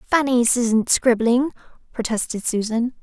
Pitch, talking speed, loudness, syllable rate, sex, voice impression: 240 Hz, 100 wpm, -20 LUFS, 4.2 syllables/s, female, feminine, adult-like, slightly fluent, slightly cute, sincere, friendly